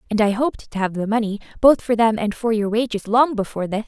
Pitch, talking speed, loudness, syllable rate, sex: 220 Hz, 265 wpm, -20 LUFS, 6.4 syllables/s, female